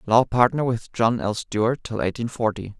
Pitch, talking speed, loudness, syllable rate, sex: 120 Hz, 195 wpm, -23 LUFS, 5.0 syllables/s, male